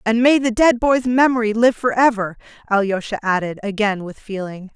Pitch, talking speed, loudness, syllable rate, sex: 220 Hz, 175 wpm, -18 LUFS, 5.2 syllables/s, female